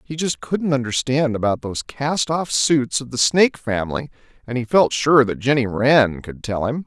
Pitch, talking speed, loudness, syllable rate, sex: 130 Hz, 200 wpm, -19 LUFS, 4.8 syllables/s, male